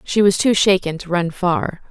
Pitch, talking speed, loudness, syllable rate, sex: 185 Hz, 220 wpm, -17 LUFS, 4.6 syllables/s, female